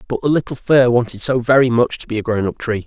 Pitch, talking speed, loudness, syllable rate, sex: 120 Hz, 295 wpm, -16 LUFS, 6.3 syllables/s, male